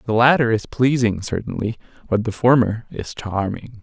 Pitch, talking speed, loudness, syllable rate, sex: 115 Hz, 155 wpm, -20 LUFS, 4.9 syllables/s, male